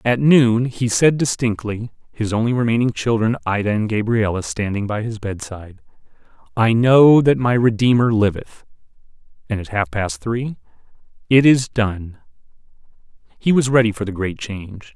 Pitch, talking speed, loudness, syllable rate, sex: 110 Hz, 150 wpm, -18 LUFS, 4.8 syllables/s, male